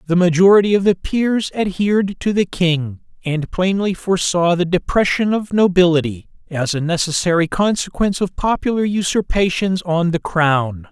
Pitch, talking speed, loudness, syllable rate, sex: 180 Hz, 145 wpm, -17 LUFS, 4.9 syllables/s, male